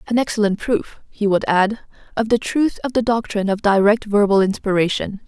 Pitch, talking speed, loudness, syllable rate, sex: 210 Hz, 180 wpm, -18 LUFS, 5.3 syllables/s, female